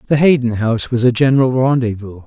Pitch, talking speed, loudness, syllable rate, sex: 120 Hz, 185 wpm, -14 LUFS, 6.3 syllables/s, male